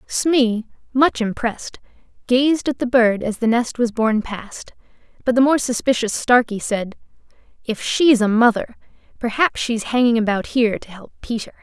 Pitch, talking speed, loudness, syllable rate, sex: 235 Hz, 170 wpm, -19 LUFS, 5.0 syllables/s, female